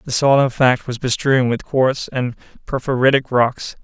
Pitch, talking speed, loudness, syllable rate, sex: 130 Hz, 170 wpm, -17 LUFS, 4.4 syllables/s, male